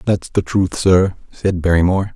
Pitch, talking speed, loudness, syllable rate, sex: 90 Hz, 165 wpm, -16 LUFS, 5.1 syllables/s, male